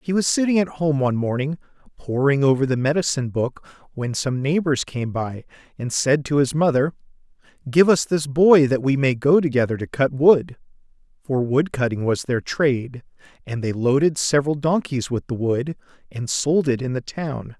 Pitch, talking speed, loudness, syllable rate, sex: 140 Hz, 185 wpm, -20 LUFS, 5.0 syllables/s, male